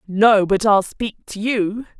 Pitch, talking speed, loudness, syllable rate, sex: 210 Hz, 180 wpm, -18 LUFS, 3.4 syllables/s, female